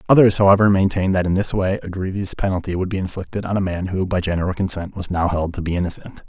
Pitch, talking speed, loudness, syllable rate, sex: 95 Hz, 250 wpm, -20 LUFS, 6.8 syllables/s, male